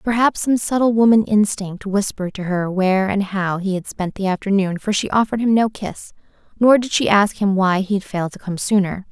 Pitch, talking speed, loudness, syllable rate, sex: 200 Hz, 225 wpm, -18 LUFS, 5.5 syllables/s, female